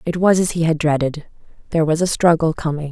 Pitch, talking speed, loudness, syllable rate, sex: 160 Hz, 205 wpm, -18 LUFS, 6.4 syllables/s, female